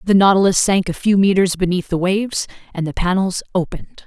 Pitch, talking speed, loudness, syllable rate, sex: 185 Hz, 190 wpm, -17 LUFS, 5.9 syllables/s, female